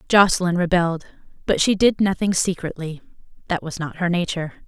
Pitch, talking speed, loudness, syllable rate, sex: 175 Hz, 155 wpm, -21 LUFS, 5.9 syllables/s, female